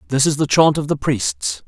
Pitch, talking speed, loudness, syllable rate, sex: 125 Hz, 250 wpm, -17 LUFS, 4.9 syllables/s, male